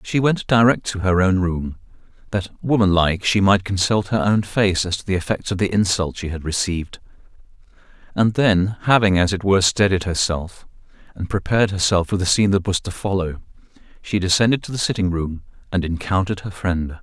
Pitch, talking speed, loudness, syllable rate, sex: 95 Hz, 190 wpm, -19 LUFS, 5.5 syllables/s, male